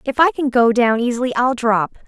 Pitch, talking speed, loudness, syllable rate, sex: 245 Hz, 230 wpm, -17 LUFS, 5.6 syllables/s, female